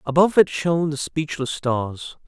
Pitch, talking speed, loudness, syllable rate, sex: 150 Hz, 160 wpm, -21 LUFS, 4.8 syllables/s, male